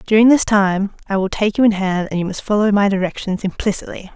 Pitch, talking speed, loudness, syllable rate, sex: 200 Hz, 230 wpm, -17 LUFS, 5.8 syllables/s, female